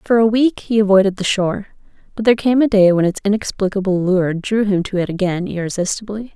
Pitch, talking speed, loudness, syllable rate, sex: 200 Hz, 210 wpm, -17 LUFS, 6.1 syllables/s, female